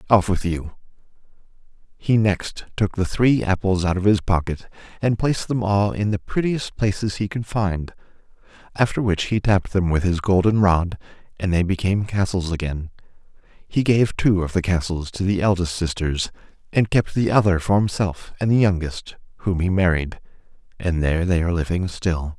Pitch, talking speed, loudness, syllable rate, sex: 95 Hz, 175 wpm, -21 LUFS, 5.0 syllables/s, male